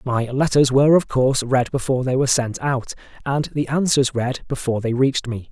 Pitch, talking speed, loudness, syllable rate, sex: 130 Hz, 205 wpm, -19 LUFS, 5.8 syllables/s, male